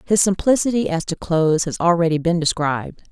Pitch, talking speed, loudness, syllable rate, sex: 170 Hz, 175 wpm, -19 LUFS, 5.8 syllables/s, female